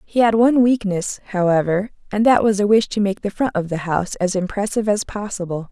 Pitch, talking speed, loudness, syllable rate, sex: 200 Hz, 220 wpm, -19 LUFS, 6.0 syllables/s, female